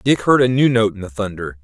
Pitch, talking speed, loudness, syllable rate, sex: 110 Hz, 295 wpm, -17 LUFS, 6.0 syllables/s, male